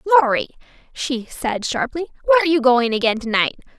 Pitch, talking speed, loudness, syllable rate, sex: 270 Hz, 160 wpm, -19 LUFS, 6.8 syllables/s, female